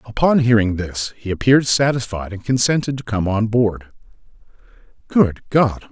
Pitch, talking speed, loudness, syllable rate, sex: 115 Hz, 140 wpm, -18 LUFS, 4.9 syllables/s, male